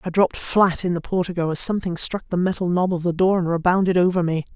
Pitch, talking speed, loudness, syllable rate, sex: 175 Hz, 250 wpm, -20 LUFS, 6.5 syllables/s, female